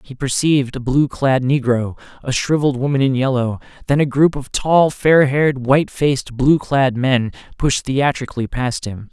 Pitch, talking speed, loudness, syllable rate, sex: 135 Hz, 180 wpm, -17 LUFS, 4.9 syllables/s, male